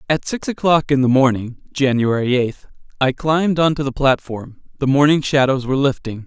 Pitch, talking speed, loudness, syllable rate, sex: 135 Hz, 170 wpm, -17 LUFS, 5.3 syllables/s, male